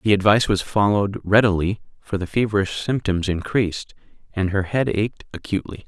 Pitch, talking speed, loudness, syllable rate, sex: 100 Hz, 155 wpm, -21 LUFS, 5.7 syllables/s, male